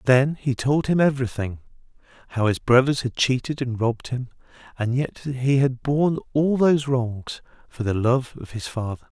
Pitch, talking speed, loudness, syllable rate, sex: 125 Hz, 185 wpm, -23 LUFS, 5.1 syllables/s, male